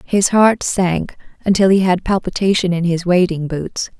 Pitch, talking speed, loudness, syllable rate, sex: 185 Hz, 165 wpm, -16 LUFS, 4.5 syllables/s, female